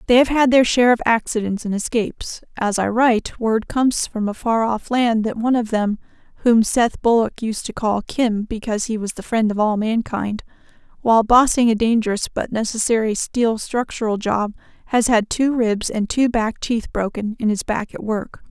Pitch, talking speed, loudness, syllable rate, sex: 225 Hz, 200 wpm, -19 LUFS, 5.0 syllables/s, female